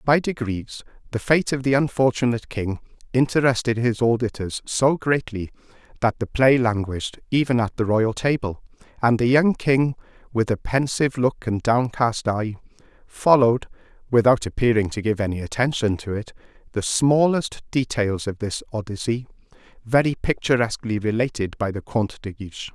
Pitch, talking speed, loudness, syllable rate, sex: 120 Hz, 150 wpm, -22 LUFS, 5.1 syllables/s, male